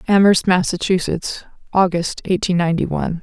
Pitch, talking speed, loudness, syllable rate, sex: 180 Hz, 110 wpm, -18 LUFS, 5.5 syllables/s, female